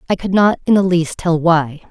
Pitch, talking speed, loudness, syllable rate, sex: 175 Hz, 250 wpm, -15 LUFS, 5.0 syllables/s, female